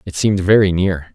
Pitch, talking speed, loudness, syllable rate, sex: 95 Hz, 210 wpm, -15 LUFS, 5.8 syllables/s, male